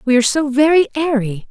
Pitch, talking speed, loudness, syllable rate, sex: 270 Hz, 200 wpm, -15 LUFS, 6.1 syllables/s, female